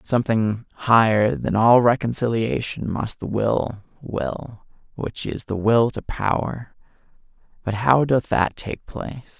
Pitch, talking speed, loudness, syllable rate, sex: 115 Hz, 135 wpm, -21 LUFS, 4.0 syllables/s, male